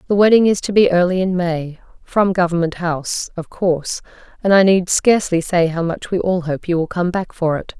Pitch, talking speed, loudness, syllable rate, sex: 180 Hz, 225 wpm, -17 LUFS, 5.4 syllables/s, female